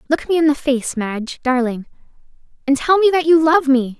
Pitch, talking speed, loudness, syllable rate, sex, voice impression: 285 Hz, 210 wpm, -16 LUFS, 5.4 syllables/s, female, feminine, young, tensed, powerful, soft, slightly muffled, cute, calm, friendly, lively, slightly kind